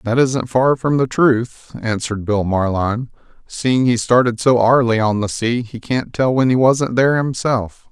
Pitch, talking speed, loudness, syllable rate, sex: 120 Hz, 190 wpm, -17 LUFS, 4.4 syllables/s, male